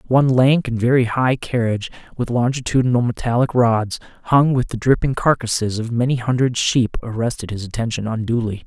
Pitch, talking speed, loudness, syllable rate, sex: 120 Hz, 160 wpm, -19 LUFS, 5.6 syllables/s, male